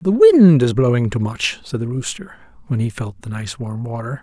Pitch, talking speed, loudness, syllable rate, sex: 130 Hz, 225 wpm, -17 LUFS, 5.0 syllables/s, male